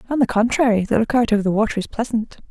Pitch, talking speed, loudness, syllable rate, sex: 225 Hz, 265 wpm, -19 LUFS, 7.2 syllables/s, female